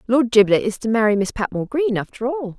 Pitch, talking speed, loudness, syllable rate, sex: 230 Hz, 230 wpm, -19 LUFS, 6.2 syllables/s, female